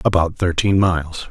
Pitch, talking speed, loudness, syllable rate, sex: 90 Hz, 140 wpm, -18 LUFS, 5.0 syllables/s, male